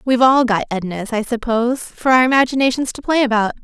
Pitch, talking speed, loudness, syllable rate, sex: 240 Hz, 200 wpm, -16 LUFS, 6.2 syllables/s, female